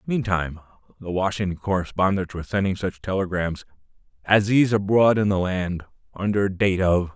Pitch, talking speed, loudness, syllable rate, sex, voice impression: 95 Hz, 145 wpm, -22 LUFS, 5.5 syllables/s, male, very masculine, old, thick, slightly powerful, very calm, slightly mature, wild